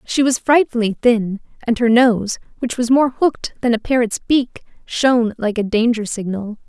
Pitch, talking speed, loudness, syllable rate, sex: 235 Hz, 180 wpm, -17 LUFS, 4.8 syllables/s, female